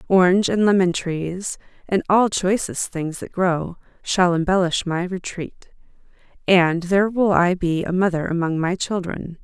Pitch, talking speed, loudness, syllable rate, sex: 180 Hz, 155 wpm, -20 LUFS, 4.4 syllables/s, female